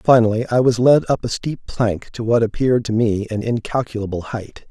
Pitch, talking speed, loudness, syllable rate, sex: 115 Hz, 205 wpm, -19 LUFS, 5.3 syllables/s, male